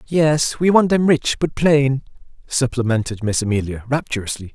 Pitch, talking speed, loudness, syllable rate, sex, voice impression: 135 Hz, 145 wpm, -18 LUFS, 4.9 syllables/s, male, masculine, adult-like, slightly soft, refreshing, sincere